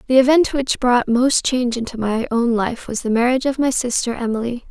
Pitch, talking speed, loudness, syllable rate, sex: 245 Hz, 215 wpm, -18 LUFS, 5.6 syllables/s, female